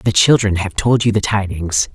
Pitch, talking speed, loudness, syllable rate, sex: 100 Hz, 215 wpm, -15 LUFS, 4.8 syllables/s, female